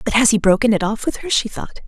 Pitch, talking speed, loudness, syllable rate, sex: 225 Hz, 320 wpm, -17 LUFS, 6.8 syllables/s, female